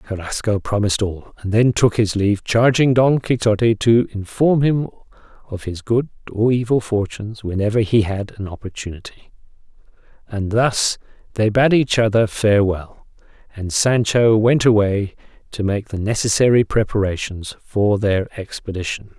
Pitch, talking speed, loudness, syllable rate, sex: 110 Hz, 140 wpm, -18 LUFS, 4.8 syllables/s, male